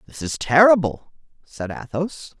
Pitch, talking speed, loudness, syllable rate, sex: 145 Hz, 125 wpm, -19 LUFS, 4.3 syllables/s, male